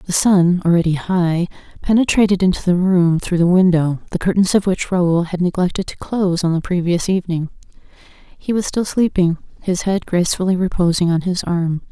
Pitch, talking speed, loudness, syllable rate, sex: 180 Hz, 175 wpm, -17 LUFS, 5.3 syllables/s, female